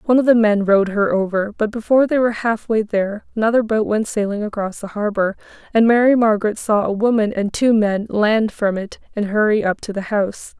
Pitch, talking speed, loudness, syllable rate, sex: 215 Hz, 215 wpm, -18 LUFS, 5.8 syllables/s, female